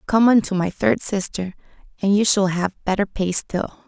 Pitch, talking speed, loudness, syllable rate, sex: 200 Hz, 200 wpm, -20 LUFS, 4.7 syllables/s, female